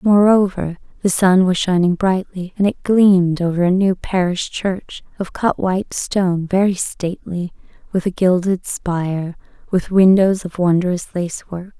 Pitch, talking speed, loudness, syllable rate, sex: 185 Hz, 150 wpm, -17 LUFS, 4.5 syllables/s, female